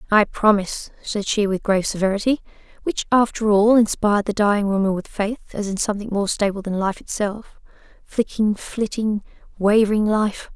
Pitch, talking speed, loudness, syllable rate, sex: 210 Hz, 155 wpm, -20 LUFS, 5.5 syllables/s, female